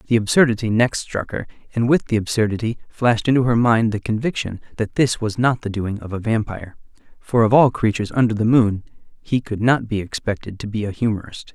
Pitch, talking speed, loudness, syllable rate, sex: 115 Hz, 210 wpm, -20 LUFS, 5.8 syllables/s, male